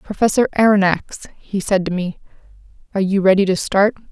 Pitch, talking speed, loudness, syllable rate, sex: 195 Hz, 160 wpm, -17 LUFS, 5.7 syllables/s, female